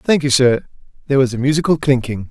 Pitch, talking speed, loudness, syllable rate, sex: 135 Hz, 210 wpm, -16 LUFS, 6.4 syllables/s, male